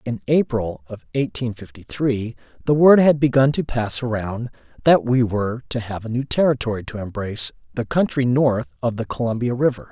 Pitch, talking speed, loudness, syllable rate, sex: 120 Hz, 180 wpm, -20 LUFS, 5.3 syllables/s, male